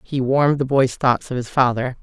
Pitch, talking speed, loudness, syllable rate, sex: 130 Hz, 235 wpm, -19 LUFS, 5.3 syllables/s, female